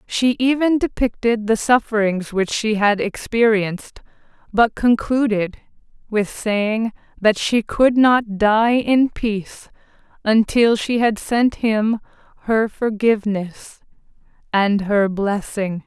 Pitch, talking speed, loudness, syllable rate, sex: 220 Hz, 115 wpm, -18 LUFS, 3.6 syllables/s, female